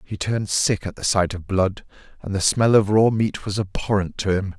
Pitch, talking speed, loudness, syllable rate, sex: 100 Hz, 235 wpm, -21 LUFS, 5.1 syllables/s, male